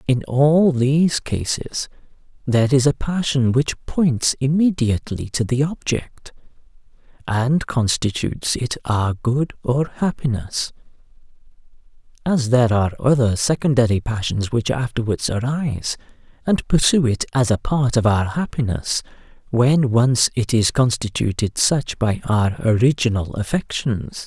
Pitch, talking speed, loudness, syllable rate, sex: 125 Hz, 120 wpm, -19 LUFS, 4.4 syllables/s, male